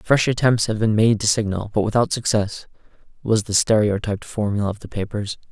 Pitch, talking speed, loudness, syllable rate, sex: 105 Hz, 185 wpm, -20 LUFS, 5.6 syllables/s, male